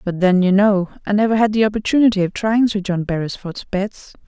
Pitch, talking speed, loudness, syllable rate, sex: 200 Hz, 210 wpm, -17 LUFS, 5.6 syllables/s, female